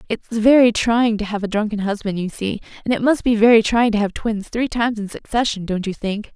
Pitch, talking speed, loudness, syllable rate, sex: 220 Hz, 245 wpm, -19 LUFS, 5.6 syllables/s, female